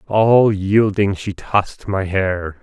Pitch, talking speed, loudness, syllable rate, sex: 100 Hz, 135 wpm, -17 LUFS, 3.3 syllables/s, male